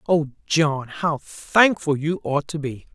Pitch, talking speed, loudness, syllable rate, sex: 155 Hz, 165 wpm, -22 LUFS, 3.6 syllables/s, female